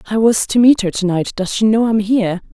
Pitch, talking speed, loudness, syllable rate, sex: 215 Hz, 280 wpm, -15 LUFS, 5.8 syllables/s, female